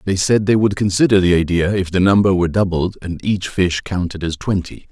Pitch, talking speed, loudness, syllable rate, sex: 95 Hz, 220 wpm, -17 LUFS, 5.5 syllables/s, male